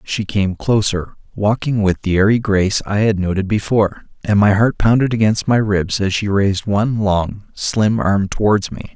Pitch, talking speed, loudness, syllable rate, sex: 105 Hz, 190 wpm, -16 LUFS, 4.8 syllables/s, male